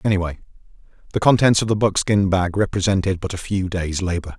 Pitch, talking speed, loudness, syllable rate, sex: 95 Hz, 180 wpm, -20 LUFS, 5.9 syllables/s, male